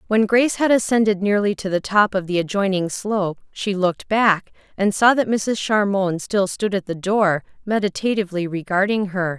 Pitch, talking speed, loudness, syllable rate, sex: 200 Hz, 180 wpm, -20 LUFS, 5.1 syllables/s, female